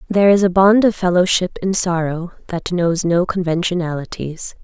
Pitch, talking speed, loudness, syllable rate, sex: 180 Hz, 155 wpm, -17 LUFS, 5.0 syllables/s, female